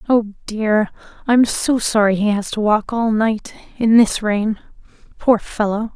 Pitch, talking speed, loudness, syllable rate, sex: 215 Hz, 160 wpm, -17 LUFS, 3.9 syllables/s, female